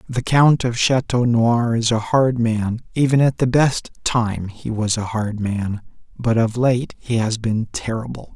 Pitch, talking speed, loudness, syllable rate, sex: 115 Hz, 185 wpm, -19 LUFS, 4.0 syllables/s, male